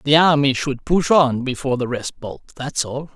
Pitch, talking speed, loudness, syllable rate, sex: 140 Hz, 210 wpm, -19 LUFS, 4.8 syllables/s, male